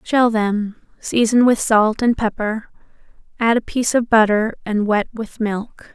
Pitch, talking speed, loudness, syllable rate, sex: 220 Hz, 160 wpm, -18 LUFS, 4.2 syllables/s, female